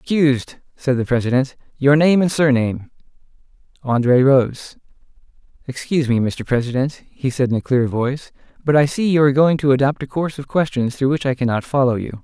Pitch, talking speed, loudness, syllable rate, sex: 135 Hz, 185 wpm, -18 LUFS, 6.0 syllables/s, male